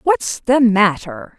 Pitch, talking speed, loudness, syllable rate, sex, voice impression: 225 Hz, 130 wpm, -15 LUFS, 3.1 syllables/s, female, feminine, middle-aged, tensed, powerful, bright, clear, intellectual, calm, slightly friendly, elegant, lively, slightly sharp